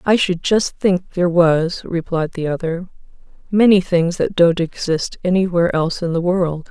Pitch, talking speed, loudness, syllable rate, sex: 175 Hz, 170 wpm, -17 LUFS, 4.8 syllables/s, female